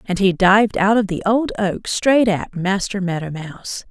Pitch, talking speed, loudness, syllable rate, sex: 195 Hz, 200 wpm, -18 LUFS, 4.6 syllables/s, female